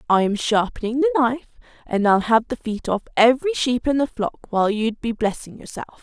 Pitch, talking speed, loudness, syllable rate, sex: 235 Hz, 210 wpm, -20 LUFS, 5.8 syllables/s, female